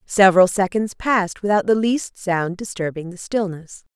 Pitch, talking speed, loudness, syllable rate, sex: 195 Hz, 150 wpm, -19 LUFS, 4.8 syllables/s, female